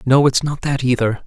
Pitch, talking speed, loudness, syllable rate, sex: 130 Hz, 235 wpm, -17 LUFS, 5.1 syllables/s, male